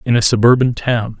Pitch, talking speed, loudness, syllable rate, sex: 115 Hz, 200 wpm, -14 LUFS, 5.6 syllables/s, male